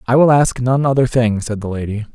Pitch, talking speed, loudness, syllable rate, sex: 120 Hz, 250 wpm, -16 LUFS, 5.6 syllables/s, male